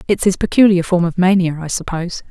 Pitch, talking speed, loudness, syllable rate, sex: 180 Hz, 210 wpm, -15 LUFS, 6.2 syllables/s, female